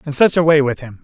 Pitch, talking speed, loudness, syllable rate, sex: 145 Hz, 350 wpm, -15 LUFS, 6.5 syllables/s, male